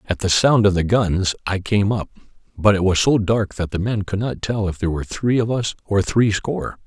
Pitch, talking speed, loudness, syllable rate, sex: 100 Hz, 255 wpm, -19 LUFS, 5.3 syllables/s, male